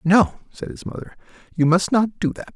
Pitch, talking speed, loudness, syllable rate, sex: 190 Hz, 210 wpm, -21 LUFS, 5.3 syllables/s, male